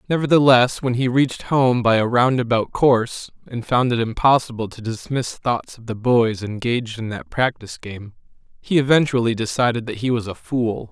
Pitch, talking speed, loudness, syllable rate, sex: 120 Hz, 175 wpm, -19 LUFS, 5.1 syllables/s, male